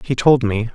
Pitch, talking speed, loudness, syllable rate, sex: 120 Hz, 240 wpm, -16 LUFS, 4.7 syllables/s, male